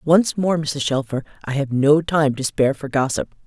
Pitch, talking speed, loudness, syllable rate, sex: 145 Hz, 210 wpm, -20 LUFS, 5.0 syllables/s, female